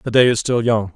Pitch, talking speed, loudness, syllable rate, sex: 115 Hz, 315 wpm, -17 LUFS, 5.9 syllables/s, male